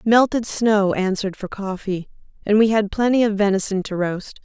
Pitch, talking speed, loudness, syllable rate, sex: 205 Hz, 175 wpm, -20 LUFS, 5.0 syllables/s, female